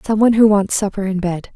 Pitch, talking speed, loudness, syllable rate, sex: 200 Hz, 270 wpm, -16 LUFS, 6.4 syllables/s, female